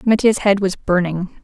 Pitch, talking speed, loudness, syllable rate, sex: 195 Hz, 165 wpm, -17 LUFS, 4.7 syllables/s, female